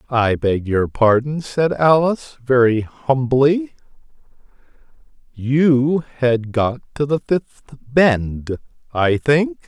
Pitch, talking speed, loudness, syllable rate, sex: 135 Hz, 105 wpm, -18 LUFS, 3.0 syllables/s, male